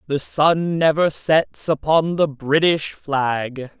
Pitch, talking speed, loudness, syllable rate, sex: 140 Hz, 125 wpm, -19 LUFS, 3.1 syllables/s, male